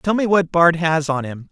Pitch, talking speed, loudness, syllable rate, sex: 165 Hz, 275 wpm, -17 LUFS, 4.8 syllables/s, male